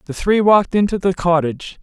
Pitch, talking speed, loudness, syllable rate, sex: 185 Hz, 195 wpm, -16 LUFS, 6.0 syllables/s, male